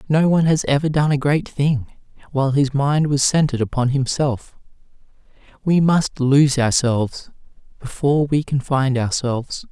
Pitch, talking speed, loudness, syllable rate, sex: 140 Hz, 150 wpm, -18 LUFS, 4.9 syllables/s, male